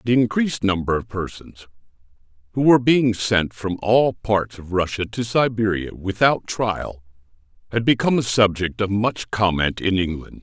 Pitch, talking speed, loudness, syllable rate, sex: 105 Hz, 155 wpm, -20 LUFS, 4.7 syllables/s, male